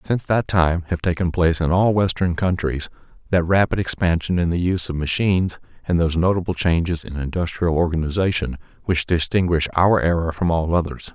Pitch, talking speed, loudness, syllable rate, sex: 85 Hz, 170 wpm, -20 LUFS, 5.7 syllables/s, male